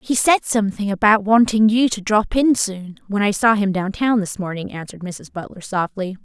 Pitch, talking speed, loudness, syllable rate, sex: 205 Hz, 200 wpm, -18 LUFS, 5.2 syllables/s, female